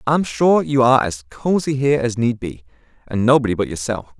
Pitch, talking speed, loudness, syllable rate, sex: 120 Hz, 200 wpm, -18 LUFS, 5.6 syllables/s, male